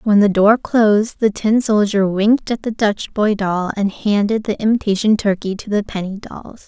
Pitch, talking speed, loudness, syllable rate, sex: 210 Hz, 200 wpm, -17 LUFS, 4.8 syllables/s, female